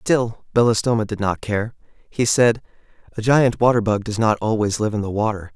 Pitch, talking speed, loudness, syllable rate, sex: 110 Hz, 195 wpm, -20 LUFS, 5.2 syllables/s, male